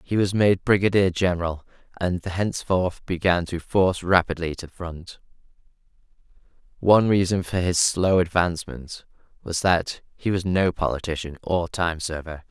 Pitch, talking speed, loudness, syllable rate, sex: 90 Hz, 140 wpm, -23 LUFS, 4.9 syllables/s, male